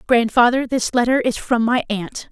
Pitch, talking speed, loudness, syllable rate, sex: 240 Hz, 180 wpm, -18 LUFS, 4.8 syllables/s, female